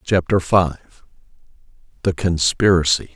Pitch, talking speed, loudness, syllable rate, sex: 85 Hz, 75 wpm, -18 LUFS, 4.0 syllables/s, male